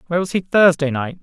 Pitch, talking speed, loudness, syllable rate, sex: 165 Hz, 245 wpm, -17 LUFS, 6.9 syllables/s, male